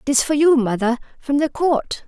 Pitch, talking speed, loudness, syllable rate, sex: 275 Hz, 205 wpm, -19 LUFS, 5.1 syllables/s, female